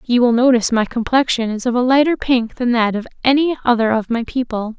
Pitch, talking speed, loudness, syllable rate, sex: 240 Hz, 225 wpm, -16 LUFS, 5.9 syllables/s, female